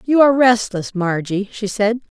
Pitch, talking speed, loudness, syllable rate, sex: 215 Hz, 165 wpm, -17 LUFS, 4.8 syllables/s, female